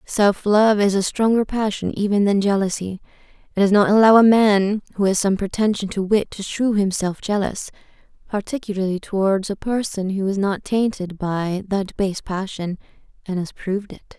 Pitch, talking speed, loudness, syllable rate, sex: 200 Hz, 175 wpm, -20 LUFS, 4.9 syllables/s, female